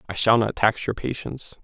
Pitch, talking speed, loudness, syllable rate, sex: 110 Hz, 220 wpm, -22 LUFS, 5.6 syllables/s, male